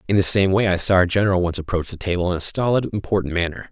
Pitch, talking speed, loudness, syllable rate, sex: 95 Hz, 275 wpm, -20 LUFS, 7.1 syllables/s, male